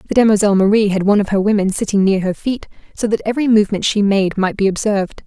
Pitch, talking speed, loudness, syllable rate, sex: 205 Hz, 240 wpm, -15 LUFS, 7.1 syllables/s, female